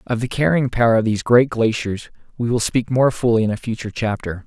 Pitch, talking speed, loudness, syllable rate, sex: 115 Hz, 230 wpm, -19 LUFS, 6.1 syllables/s, male